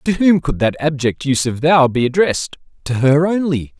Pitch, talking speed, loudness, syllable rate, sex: 145 Hz, 205 wpm, -16 LUFS, 5.3 syllables/s, male